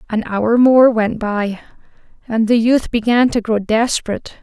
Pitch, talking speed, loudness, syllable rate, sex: 225 Hz, 165 wpm, -15 LUFS, 4.5 syllables/s, female